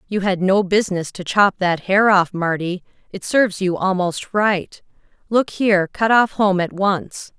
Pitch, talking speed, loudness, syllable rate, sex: 190 Hz, 180 wpm, -18 LUFS, 4.3 syllables/s, female